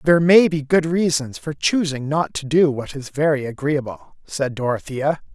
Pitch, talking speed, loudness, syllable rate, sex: 150 Hz, 190 wpm, -19 LUFS, 4.9 syllables/s, male